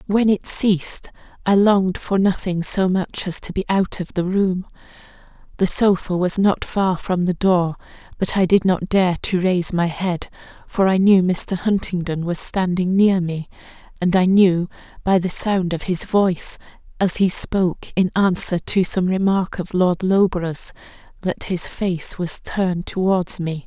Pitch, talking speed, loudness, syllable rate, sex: 185 Hz, 175 wpm, -19 LUFS, 4.3 syllables/s, female